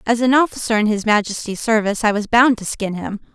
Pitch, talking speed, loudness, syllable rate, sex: 220 Hz, 235 wpm, -17 LUFS, 6.1 syllables/s, female